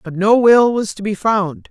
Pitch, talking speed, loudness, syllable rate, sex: 210 Hz, 245 wpm, -14 LUFS, 4.4 syllables/s, female